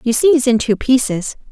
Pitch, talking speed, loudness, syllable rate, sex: 250 Hz, 240 wpm, -15 LUFS, 5.4 syllables/s, female